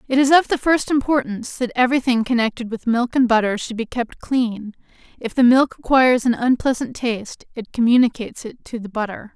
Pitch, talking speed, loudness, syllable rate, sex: 240 Hz, 200 wpm, -19 LUFS, 5.7 syllables/s, female